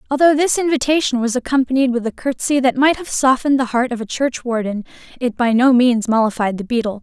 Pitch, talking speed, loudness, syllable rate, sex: 250 Hz, 215 wpm, -17 LUFS, 6.1 syllables/s, female